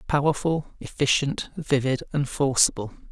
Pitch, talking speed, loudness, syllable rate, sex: 140 Hz, 95 wpm, -24 LUFS, 4.8 syllables/s, male